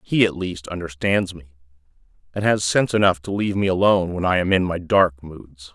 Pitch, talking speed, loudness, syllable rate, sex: 90 Hz, 200 wpm, -20 LUFS, 5.6 syllables/s, male